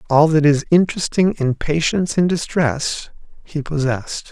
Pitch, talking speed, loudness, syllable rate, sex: 155 Hz, 140 wpm, -18 LUFS, 4.8 syllables/s, male